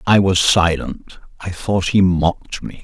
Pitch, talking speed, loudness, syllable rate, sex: 90 Hz, 170 wpm, -16 LUFS, 4.0 syllables/s, male